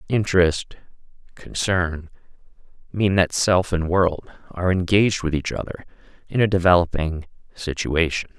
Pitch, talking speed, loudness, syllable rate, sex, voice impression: 90 Hz, 115 wpm, -21 LUFS, 4.7 syllables/s, male, very masculine, slightly young, adult-like, very thick, slightly relaxed, slightly weak, slightly dark, soft, muffled, fluent, cool, very intellectual, slightly refreshing, very sincere, very calm, mature, very friendly, very reassuring, unique, very elegant, slightly wild, slightly sweet, slightly lively, very kind, very modest, slightly light